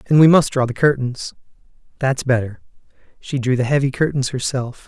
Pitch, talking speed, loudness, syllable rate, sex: 135 Hz, 160 wpm, -18 LUFS, 5.5 syllables/s, male